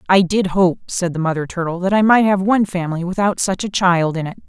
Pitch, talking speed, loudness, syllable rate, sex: 185 Hz, 255 wpm, -17 LUFS, 5.9 syllables/s, female